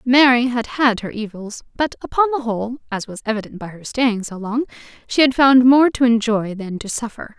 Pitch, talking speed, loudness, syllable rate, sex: 235 Hz, 210 wpm, -18 LUFS, 5.3 syllables/s, female